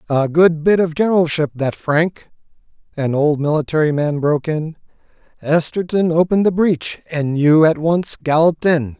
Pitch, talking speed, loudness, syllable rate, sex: 160 Hz, 155 wpm, -16 LUFS, 4.9 syllables/s, male